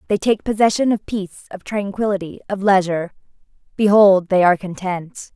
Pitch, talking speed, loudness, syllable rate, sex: 195 Hz, 145 wpm, -18 LUFS, 5.7 syllables/s, female